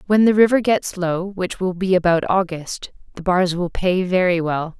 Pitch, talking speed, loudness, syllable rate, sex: 185 Hz, 200 wpm, -19 LUFS, 4.6 syllables/s, female